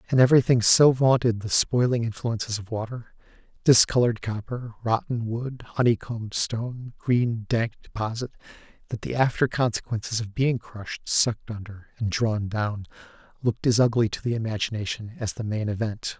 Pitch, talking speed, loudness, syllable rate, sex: 115 Hz, 145 wpm, -24 LUFS, 5.3 syllables/s, male